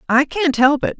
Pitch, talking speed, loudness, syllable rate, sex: 290 Hz, 240 wpm, -16 LUFS, 4.9 syllables/s, female